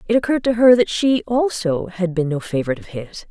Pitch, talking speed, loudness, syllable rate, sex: 205 Hz, 235 wpm, -18 LUFS, 6.1 syllables/s, female